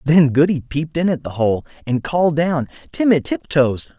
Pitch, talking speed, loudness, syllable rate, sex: 150 Hz, 165 wpm, -18 LUFS, 5.0 syllables/s, male